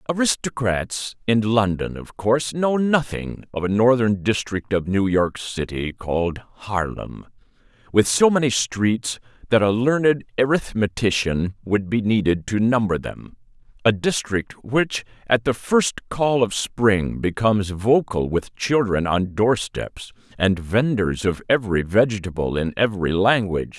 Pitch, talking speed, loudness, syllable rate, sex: 110 Hz, 140 wpm, -21 LUFS, 4.2 syllables/s, male